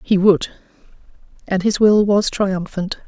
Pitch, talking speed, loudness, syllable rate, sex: 195 Hz, 135 wpm, -17 LUFS, 3.8 syllables/s, female